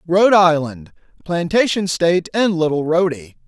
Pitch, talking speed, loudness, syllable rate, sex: 170 Hz, 120 wpm, -16 LUFS, 4.7 syllables/s, male